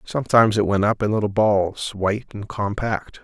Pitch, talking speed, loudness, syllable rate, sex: 105 Hz, 185 wpm, -20 LUFS, 5.4 syllables/s, male